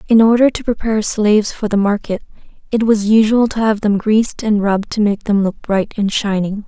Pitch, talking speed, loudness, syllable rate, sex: 210 Hz, 215 wpm, -15 LUFS, 5.5 syllables/s, female